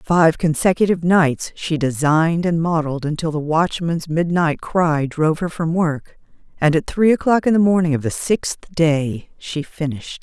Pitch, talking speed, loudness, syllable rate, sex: 165 Hz, 170 wpm, -18 LUFS, 4.6 syllables/s, female